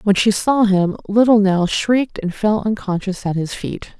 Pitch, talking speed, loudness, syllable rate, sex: 200 Hz, 195 wpm, -17 LUFS, 4.6 syllables/s, female